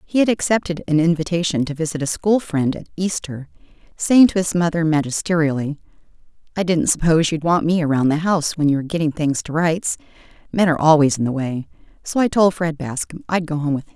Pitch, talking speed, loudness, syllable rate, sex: 165 Hz, 210 wpm, -19 LUFS, 6.0 syllables/s, female